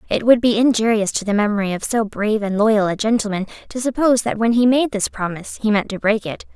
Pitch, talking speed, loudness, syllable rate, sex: 215 Hz, 245 wpm, -18 LUFS, 6.3 syllables/s, female